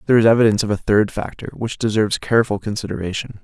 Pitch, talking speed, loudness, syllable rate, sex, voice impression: 110 Hz, 190 wpm, -19 LUFS, 7.4 syllables/s, male, masculine, adult-like, slightly soft, slightly fluent, slightly refreshing, sincere, kind